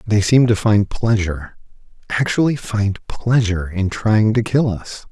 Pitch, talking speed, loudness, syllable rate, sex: 105 Hz, 155 wpm, -18 LUFS, 4.3 syllables/s, male